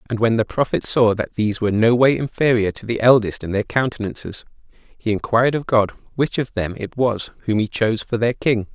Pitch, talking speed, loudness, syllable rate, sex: 115 Hz, 220 wpm, -19 LUFS, 5.7 syllables/s, male